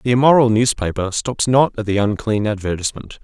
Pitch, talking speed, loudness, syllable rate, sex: 110 Hz, 165 wpm, -17 LUFS, 5.7 syllables/s, male